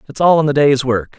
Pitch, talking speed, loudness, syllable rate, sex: 140 Hz, 305 wpm, -14 LUFS, 5.9 syllables/s, male